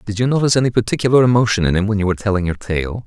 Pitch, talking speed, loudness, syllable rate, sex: 105 Hz, 275 wpm, -16 LUFS, 8.1 syllables/s, male